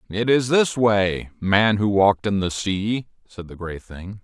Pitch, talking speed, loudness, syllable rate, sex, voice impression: 105 Hz, 200 wpm, -20 LUFS, 4.0 syllables/s, male, masculine, adult-like, tensed, powerful, clear, fluent, cool, intellectual, calm, friendly, wild, slightly lively, slightly strict, slightly modest